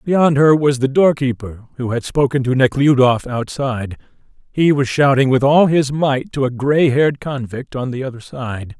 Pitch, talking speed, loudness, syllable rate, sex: 135 Hz, 175 wpm, -16 LUFS, 4.8 syllables/s, male